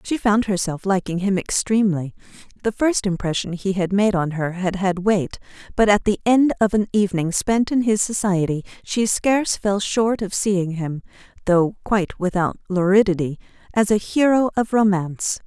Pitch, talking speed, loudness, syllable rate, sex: 195 Hz, 165 wpm, -20 LUFS, 4.9 syllables/s, female